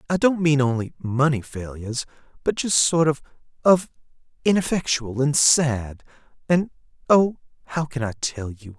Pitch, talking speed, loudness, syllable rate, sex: 145 Hz, 130 wpm, -22 LUFS, 4.6 syllables/s, male